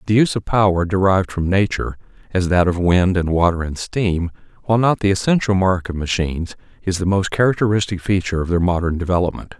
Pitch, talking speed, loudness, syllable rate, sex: 95 Hz, 195 wpm, -18 LUFS, 6.2 syllables/s, male